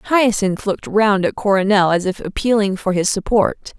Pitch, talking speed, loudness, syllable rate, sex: 200 Hz, 175 wpm, -17 LUFS, 4.9 syllables/s, female